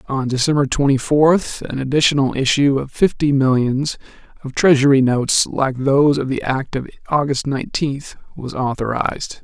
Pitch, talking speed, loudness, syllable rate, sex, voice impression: 140 Hz, 145 wpm, -17 LUFS, 5.0 syllables/s, male, masculine, very middle-aged, slightly thick, cool, sincere, slightly calm